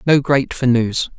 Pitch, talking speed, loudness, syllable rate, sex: 130 Hz, 205 wpm, -16 LUFS, 4.0 syllables/s, male